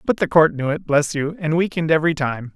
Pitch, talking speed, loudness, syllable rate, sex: 155 Hz, 260 wpm, -19 LUFS, 6.3 syllables/s, male